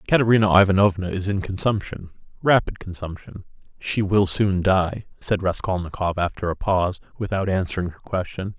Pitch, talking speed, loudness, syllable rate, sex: 95 Hz, 140 wpm, -22 LUFS, 5.4 syllables/s, male